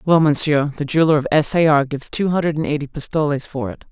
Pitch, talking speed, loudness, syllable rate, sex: 150 Hz, 245 wpm, -18 LUFS, 6.6 syllables/s, female